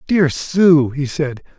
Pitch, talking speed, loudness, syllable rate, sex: 150 Hz, 150 wpm, -16 LUFS, 3.1 syllables/s, male